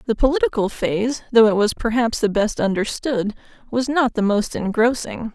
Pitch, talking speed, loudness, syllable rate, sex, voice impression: 225 Hz, 170 wpm, -20 LUFS, 5.1 syllables/s, female, very feminine, very adult-like, slightly middle-aged, thin, very tensed, very powerful, very bright, very hard, very clear, very fluent, slightly raspy, cool, very intellectual, refreshing, very sincere, calm, slightly friendly, reassuring, very unique, very elegant, very lively, very strict, very intense, very sharp